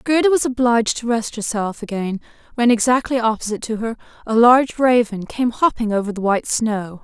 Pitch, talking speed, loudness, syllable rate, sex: 230 Hz, 180 wpm, -18 LUFS, 5.7 syllables/s, female